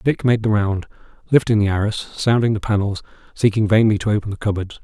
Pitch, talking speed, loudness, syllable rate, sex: 105 Hz, 200 wpm, -19 LUFS, 6.0 syllables/s, male